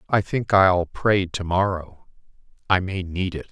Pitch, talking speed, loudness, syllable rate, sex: 90 Hz, 170 wpm, -22 LUFS, 4.1 syllables/s, male